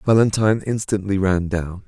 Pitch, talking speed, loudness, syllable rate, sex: 100 Hz, 130 wpm, -20 LUFS, 5.2 syllables/s, male